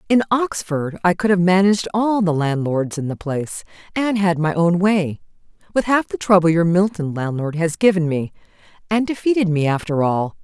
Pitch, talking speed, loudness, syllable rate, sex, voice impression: 180 Hz, 185 wpm, -19 LUFS, 5.1 syllables/s, female, very feminine, very adult-like, slightly middle-aged, thin, slightly tensed, slightly powerful, slightly dark, hard, clear, fluent, slightly raspy, cool, very intellectual, refreshing, sincere, very calm, friendly, reassuring, unique, elegant, slightly wild, lively, slightly strict, slightly intense